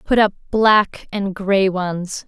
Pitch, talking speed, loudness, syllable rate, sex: 195 Hz, 160 wpm, -18 LUFS, 3.1 syllables/s, female